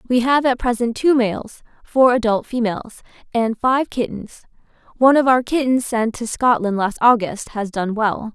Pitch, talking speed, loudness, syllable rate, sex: 235 Hz, 175 wpm, -18 LUFS, 4.7 syllables/s, female